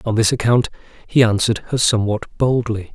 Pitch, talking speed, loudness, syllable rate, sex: 110 Hz, 165 wpm, -18 LUFS, 5.7 syllables/s, male